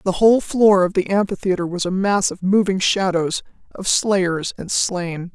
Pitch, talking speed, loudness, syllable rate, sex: 190 Hz, 180 wpm, -19 LUFS, 4.5 syllables/s, female